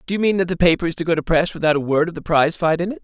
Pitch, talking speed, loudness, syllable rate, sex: 170 Hz, 395 wpm, -19 LUFS, 8.0 syllables/s, male